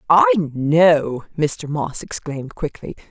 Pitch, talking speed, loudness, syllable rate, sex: 145 Hz, 115 wpm, -19 LUFS, 3.4 syllables/s, female